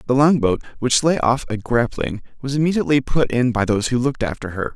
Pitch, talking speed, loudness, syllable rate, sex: 125 Hz, 225 wpm, -19 LUFS, 6.3 syllables/s, male